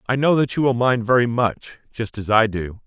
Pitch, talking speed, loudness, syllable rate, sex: 120 Hz, 250 wpm, -19 LUFS, 5.1 syllables/s, male